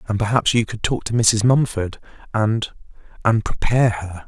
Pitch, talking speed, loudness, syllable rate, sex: 110 Hz, 155 wpm, -20 LUFS, 4.9 syllables/s, male